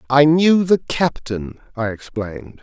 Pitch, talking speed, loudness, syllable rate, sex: 130 Hz, 135 wpm, -18 LUFS, 4.0 syllables/s, male